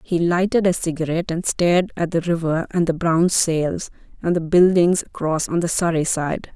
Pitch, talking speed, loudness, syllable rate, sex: 170 Hz, 190 wpm, -20 LUFS, 4.9 syllables/s, female